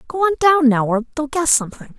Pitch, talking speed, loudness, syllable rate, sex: 285 Hz, 240 wpm, -16 LUFS, 6.3 syllables/s, female